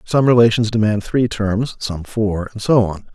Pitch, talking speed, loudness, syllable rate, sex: 110 Hz, 190 wpm, -17 LUFS, 4.4 syllables/s, male